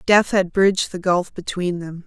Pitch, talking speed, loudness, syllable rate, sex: 185 Hz, 205 wpm, -20 LUFS, 4.6 syllables/s, female